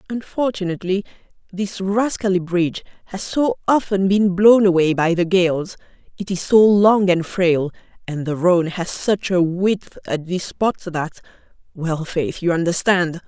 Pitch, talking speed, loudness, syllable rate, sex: 185 Hz, 150 wpm, -19 LUFS, 4.4 syllables/s, female